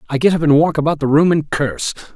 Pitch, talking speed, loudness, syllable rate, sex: 150 Hz, 280 wpm, -15 LUFS, 6.7 syllables/s, male